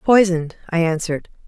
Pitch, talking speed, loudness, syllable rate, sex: 175 Hz, 120 wpm, -19 LUFS, 6.2 syllables/s, female